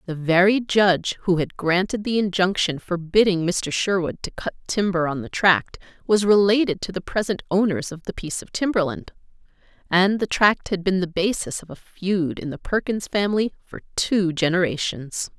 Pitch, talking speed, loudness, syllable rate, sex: 185 Hz, 175 wpm, -22 LUFS, 5.0 syllables/s, female